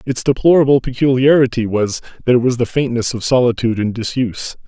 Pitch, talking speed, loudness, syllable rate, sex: 125 Hz, 165 wpm, -15 LUFS, 6.1 syllables/s, male